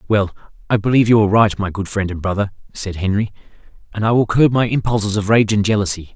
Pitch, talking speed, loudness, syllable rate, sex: 105 Hz, 225 wpm, -17 LUFS, 6.7 syllables/s, male